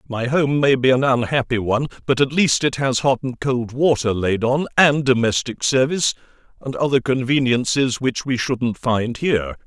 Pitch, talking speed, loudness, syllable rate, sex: 130 Hz, 180 wpm, -19 LUFS, 4.9 syllables/s, male